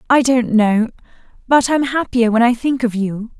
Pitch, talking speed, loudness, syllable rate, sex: 240 Hz, 175 wpm, -16 LUFS, 4.7 syllables/s, female